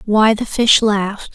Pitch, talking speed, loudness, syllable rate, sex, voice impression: 215 Hz, 180 wpm, -14 LUFS, 4.2 syllables/s, female, feminine, adult-like, tensed, bright, soft, fluent, intellectual, friendly, reassuring, elegant, lively, slightly sharp